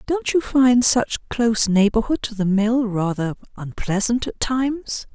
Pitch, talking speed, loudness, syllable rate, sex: 230 Hz, 150 wpm, -20 LUFS, 4.3 syllables/s, female